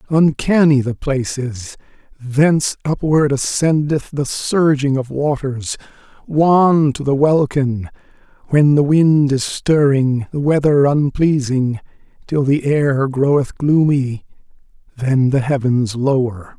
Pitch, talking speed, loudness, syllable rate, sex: 140 Hz, 115 wpm, -16 LUFS, 3.7 syllables/s, male